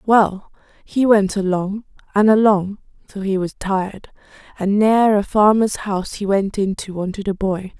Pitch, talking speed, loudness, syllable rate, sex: 200 Hz, 160 wpm, -18 LUFS, 4.6 syllables/s, female